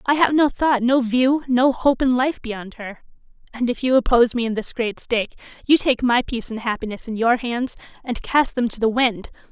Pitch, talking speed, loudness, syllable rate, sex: 245 Hz, 225 wpm, -20 LUFS, 5.2 syllables/s, female